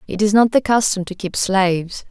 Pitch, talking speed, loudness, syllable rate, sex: 200 Hz, 230 wpm, -17 LUFS, 5.2 syllables/s, female